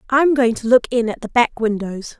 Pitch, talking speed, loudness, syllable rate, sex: 235 Hz, 245 wpm, -17 LUFS, 5.1 syllables/s, female